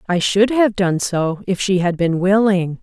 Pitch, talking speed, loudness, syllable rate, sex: 190 Hz, 215 wpm, -17 LUFS, 4.3 syllables/s, female